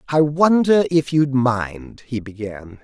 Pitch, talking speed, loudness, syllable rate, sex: 135 Hz, 150 wpm, -18 LUFS, 3.5 syllables/s, male